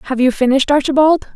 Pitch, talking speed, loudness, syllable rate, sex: 275 Hz, 175 wpm, -13 LUFS, 7.1 syllables/s, female